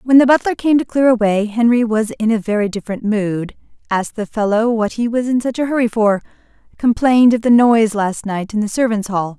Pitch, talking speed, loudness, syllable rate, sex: 225 Hz, 215 wpm, -16 LUFS, 5.8 syllables/s, female